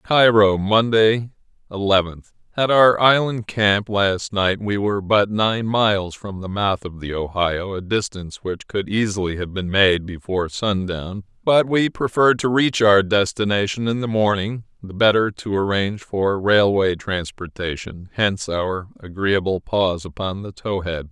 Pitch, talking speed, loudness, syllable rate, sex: 100 Hz, 150 wpm, -19 LUFS, 4.5 syllables/s, male